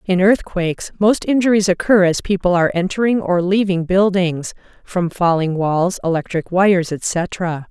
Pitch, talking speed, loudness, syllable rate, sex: 185 Hz, 140 wpm, -17 LUFS, 3.6 syllables/s, female